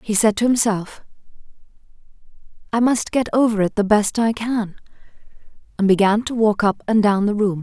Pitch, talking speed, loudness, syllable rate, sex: 215 Hz, 175 wpm, -18 LUFS, 5.3 syllables/s, female